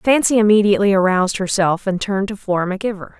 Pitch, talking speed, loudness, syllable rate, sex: 200 Hz, 190 wpm, -17 LUFS, 6.7 syllables/s, female